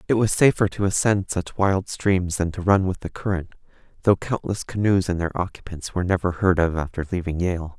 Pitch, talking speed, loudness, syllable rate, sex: 90 Hz, 210 wpm, -22 LUFS, 5.4 syllables/s, male